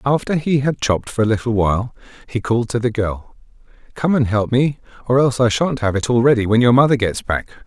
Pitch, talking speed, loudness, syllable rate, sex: 120 Hz, 235 wpm, -17 LUFS, 6.1 syllables/s, male